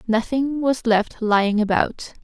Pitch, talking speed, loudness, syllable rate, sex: 230 Hz, 135 wpm, -20 LUFS, 4.0 syllables/s, female